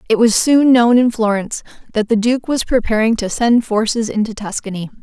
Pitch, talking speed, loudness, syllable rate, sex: 225 Hz, 190 wpm, -15 LUFS, 5.4 syllables/s, female